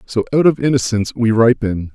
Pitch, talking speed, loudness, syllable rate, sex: 115 Hz, 185 wpm, -15 LUFS, 5.8 syllables/s, male